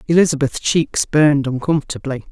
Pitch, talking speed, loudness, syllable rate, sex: 145 Hz, 105 wpm, -17 LUFS, 5.6 syllables/s, female